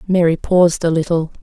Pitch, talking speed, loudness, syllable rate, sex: 170 Hz, 170 wpm, -15 LUFS, 5.9 syllables/s, female